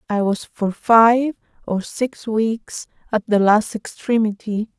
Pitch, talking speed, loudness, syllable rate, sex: 220 Hz, 140 wpm, -19 LUFS, 3.5 syllables/s, female